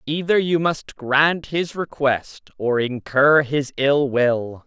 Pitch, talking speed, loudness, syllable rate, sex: 140 Hz, 140 wpm, -20 LUFS, 3.2 syllables/s, male